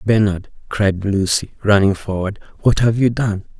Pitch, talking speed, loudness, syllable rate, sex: 105 Hz, 150 wpm, -17 LUFS, 4.5 syllables/s, male